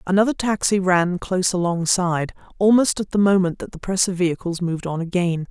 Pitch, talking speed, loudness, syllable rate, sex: 185 Hz, 185 wpm, -20 LUFS, 5.8 syllables/s, female